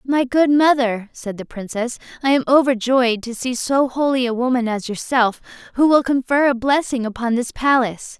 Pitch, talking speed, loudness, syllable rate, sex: 250 Hz, 185 wpm, -18 LUFS, 5.0 syllables/s, female